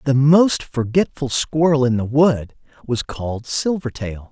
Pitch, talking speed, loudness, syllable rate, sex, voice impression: 135 Hz, 140 wpm, -18 LUFS, 4.1 syllables/s, male, very masculine, very adult-like, slightly thick, slightly tensed, powerful, slightly bright, soft, clear, fluent, slightly raspy, cool, intellectual, very refreshing, sincere, calm, slightly mature, friendly, reassuring, unique, slightly elegant, wild, slightly sweet, lively, kind, slightly intense